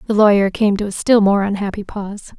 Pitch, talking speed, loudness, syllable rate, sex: 205 Hz, 225 wpm, -16 LUFS, 6.1 syllables/s, female